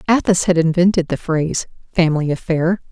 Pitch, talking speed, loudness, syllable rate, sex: 170 Hz, 145 wpm, -17 LUFS, 5.8 syllables/s, female